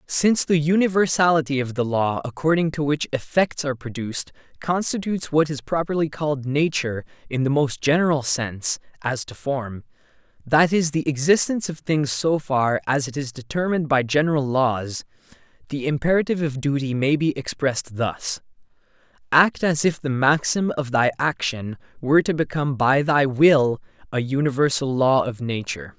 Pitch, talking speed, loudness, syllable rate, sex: 145 Hz, 155 wpm, -21 LUFS, 5.2 syllables/s, male